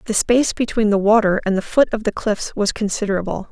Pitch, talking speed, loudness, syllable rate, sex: 210 Hz, 220 wpm, -18 LUFS, 6.0 syllables/s, female